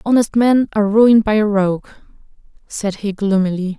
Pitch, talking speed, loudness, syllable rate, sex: 210 Hz, 160 wpm, -15 LUFS, 5.7 syllables/s, female